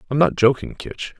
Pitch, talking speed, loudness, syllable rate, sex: 140 Hz, 200 wpm, -19 LUFS, 5.1 syllables/s, male